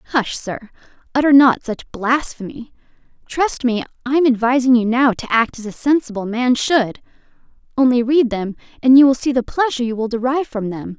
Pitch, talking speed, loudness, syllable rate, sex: 245 Hz, 185 wpm, -17 LUFS, 5.4 syllables/s, female